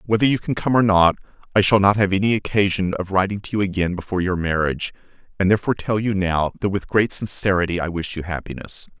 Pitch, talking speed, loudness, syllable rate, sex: 95 Hz, 220 wpm, -20 LUFS, 6.4 syllables/s, male